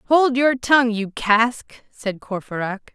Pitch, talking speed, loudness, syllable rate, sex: 235 Hz, 145 wpm, -20 LUFS, 3.9 syllables/s, female